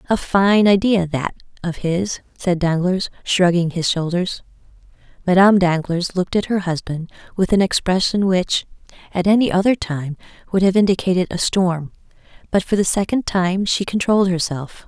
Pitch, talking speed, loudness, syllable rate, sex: 185 Hz, 155 wpm, -18 LUFS, 5.0 syllables/s, female